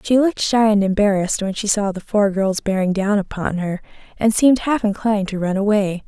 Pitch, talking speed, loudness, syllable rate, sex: 205 Hz, 215 wpm, -18 LUFS, 5.7 syllables/s, female